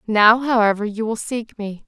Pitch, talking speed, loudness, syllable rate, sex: 220 Hz, 190 wpm, -18 LUFS, 4.6 syllables/s, female